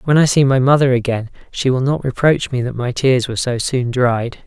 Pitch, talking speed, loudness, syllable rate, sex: 130 Hz, 240 wpm, -16 LUFS, 5.3 syllables/s, male